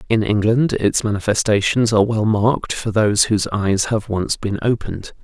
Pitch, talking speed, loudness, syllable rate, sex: 110 Hz, 170 wpm, -18 LUFS, 5.3 syllables/s, male